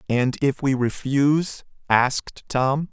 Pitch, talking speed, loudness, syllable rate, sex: 135 Hz, 125 wpm, -22 LUFS, 3.7 syllables/s, male